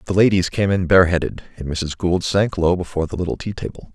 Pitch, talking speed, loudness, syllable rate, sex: 90 Hz, 230 wpm, -19 LUFS, 6.3 syllables/s, male